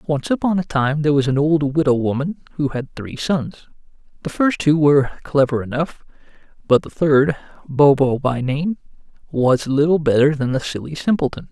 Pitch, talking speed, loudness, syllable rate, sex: 145 Hz, 170 wpm, -18 LUFS, 5.2 syllables/s, male